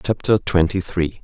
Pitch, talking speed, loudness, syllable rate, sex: 90 Hz, 145 wpm, -19 LUFS, 4.4 syllables/s, male